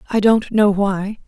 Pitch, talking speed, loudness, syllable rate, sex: 205 Hz, 190 wpm, -17 LUFS, 3.9 syllables/s, female